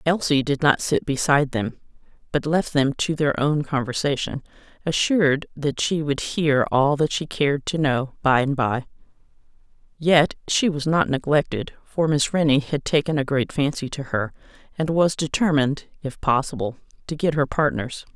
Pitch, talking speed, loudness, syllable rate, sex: 145 Hz, 170 wpm, -22 LUFS, 4.8 syllables/s, female